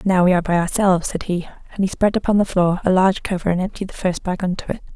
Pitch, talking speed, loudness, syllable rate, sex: 185 Hz, 280 wpm, -19 LUFS, 7.0 syllables/s, female